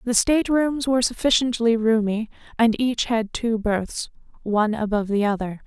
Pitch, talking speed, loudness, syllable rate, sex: 225 Hz, 160 wpm, -22 LUFS, 5.1 syllables/s, female